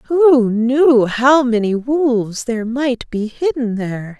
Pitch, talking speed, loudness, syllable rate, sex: 245 Hz, 145 wpm, -15 LUFS, 3.6 syllables/s, female